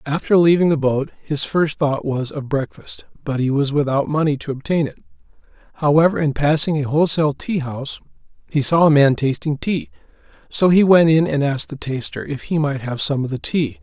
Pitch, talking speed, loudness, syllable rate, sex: 150 Hz, 205 wpm, -18 LUFS, 5.5 syllables/s, male